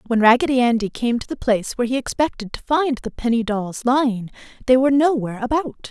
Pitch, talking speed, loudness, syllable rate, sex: 245 Hz, 205 wpm, -19 LUFS, 6.3 syllables/s, female